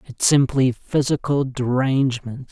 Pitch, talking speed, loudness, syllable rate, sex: 130 Hz, 95 wpm, -20 LUFS, 4.3 syllables/s, male